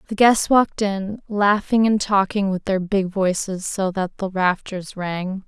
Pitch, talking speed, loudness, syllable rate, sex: 195 Hz, 175 wpm, -20 LUFS, 4.1 syllables/s, female